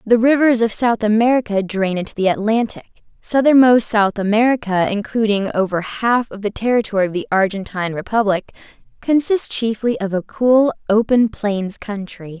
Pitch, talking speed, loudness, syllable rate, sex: 215 Hz, 145 wpm, -17 LUFS, 5.1 syllables/s, female